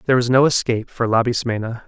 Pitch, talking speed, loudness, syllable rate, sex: 120 Hz, 190 wpm, -18 LUFS, 7.0 syllables/s, male